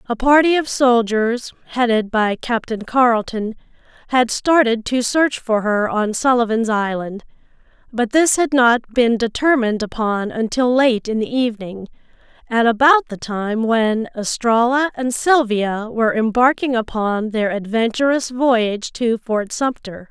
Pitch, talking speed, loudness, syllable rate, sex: 235 Hz, 135 wpm, -17 LUFS, 4.3 syllables/s, female